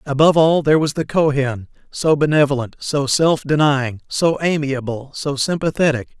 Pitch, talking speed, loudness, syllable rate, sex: 145 Hz, 145 wpm, -17 LUFS, 5.0 syllables/s, male